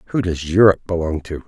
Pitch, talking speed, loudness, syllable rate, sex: 90 Hz, 205 wpm, -18 LUFS, 6.9 syllables/s, male